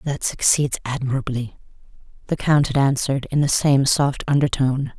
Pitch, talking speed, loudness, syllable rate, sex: 135 Hz, 145 wpm, -20 LUFS, 5.3 syllables/s, female